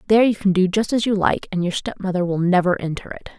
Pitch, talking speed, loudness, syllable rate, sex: 190 Hz, 285 wpm, -20 LUFS, 6.5 syllables/s, female